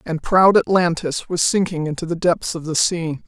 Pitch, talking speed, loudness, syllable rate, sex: 170 Hz, 200 wpm, -18 LUFS, 4.8 syllables/s, female